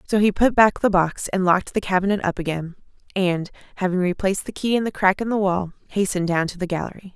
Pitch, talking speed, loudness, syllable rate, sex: 190 Hz, 235 wpm, -21 LUFS, 6.4 syllables/s, female